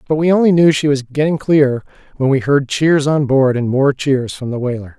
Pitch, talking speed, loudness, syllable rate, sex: 140 Hz, 240 wpm, -15 LUFS, 5.1 syllables/s, male